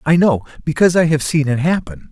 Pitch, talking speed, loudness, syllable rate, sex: 150 Hz, 225 wpm, -16 LUFS, 6.0 syllables/s, male